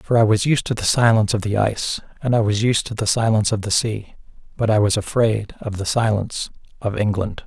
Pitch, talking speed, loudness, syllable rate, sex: 110 Hz, 235 wpm, -20 LUFS, 5.9 syllables/s, male